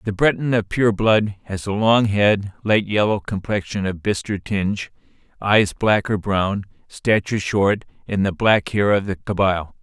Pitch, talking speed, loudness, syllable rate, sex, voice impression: 100 Hz, 170 wpm, -20 LUFS, 4.5 syllables/s, male, very masculine, very adult-like, middle-aged, thick, tensed, powerful, slightly bright, slightly soft, clear, fluent, very cool, very intellectual, refreshing, sincere, calm, slightly mature, friendly, reassuring, slightly wild, slightly sweet, lively, very kind